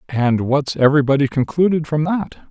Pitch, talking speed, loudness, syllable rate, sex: 145 Hz, 145 wpm, -17 LUFS, 5.2 syllables/s, male